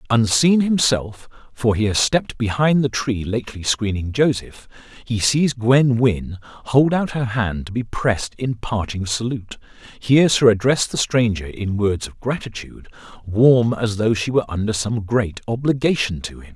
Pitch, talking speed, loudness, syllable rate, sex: 115 Hz, 155 wpm, -19 LUFS, 4.7 syllables/s, male